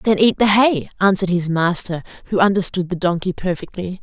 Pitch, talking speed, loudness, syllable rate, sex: 185 Hz, 180 wpm, -18 LUFS, 5.5 syllables/s, female